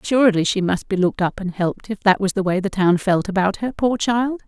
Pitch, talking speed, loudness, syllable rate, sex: 200 Hz, 270 wpm, -19 LUFS, 6.0 syllables/s, female